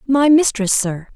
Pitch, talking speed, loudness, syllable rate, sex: 240 Hz, 155 wpm, -15 LUFS, 4.0 syllables/s, female